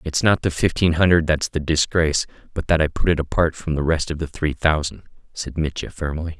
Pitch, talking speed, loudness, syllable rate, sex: 80 Hz, 225 wpm, -21 LUFS, 5.6 syllables/s, male